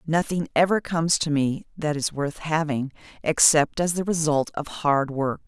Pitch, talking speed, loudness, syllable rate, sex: 155 Hz, 175 wpm, -23 LUFS, 4.6 syllables/s, female